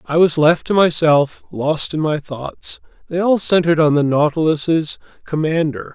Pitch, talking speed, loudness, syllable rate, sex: 160 Hz, 160 wpm, -17 LUFS, 4.4 syllables/s, male